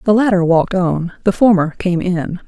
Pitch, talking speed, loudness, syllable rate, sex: 185 Hz, 195 wpm, -15 LUFS, 5.1 syllables/s, female